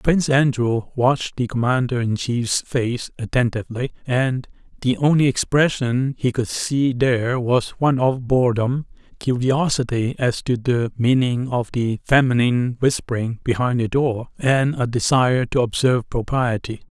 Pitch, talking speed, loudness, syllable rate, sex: 125 Hz, 140 wpm, -20 LUFS, 4.6 syllables/s, male